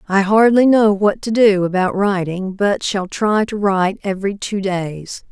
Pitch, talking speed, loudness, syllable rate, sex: 200 Hz, 180 wpm, -16 LUFS, 4.4 syllables/s, female